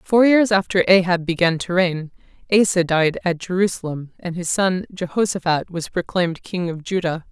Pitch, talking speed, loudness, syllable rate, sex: 180 Hz, 165 wpm, -19 LUFS, 5.0 syllables/s, female